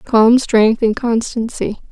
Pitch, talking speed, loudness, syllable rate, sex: 230 Hz, 125 wpm, -15 LUFS, 3.6 syllables/s, female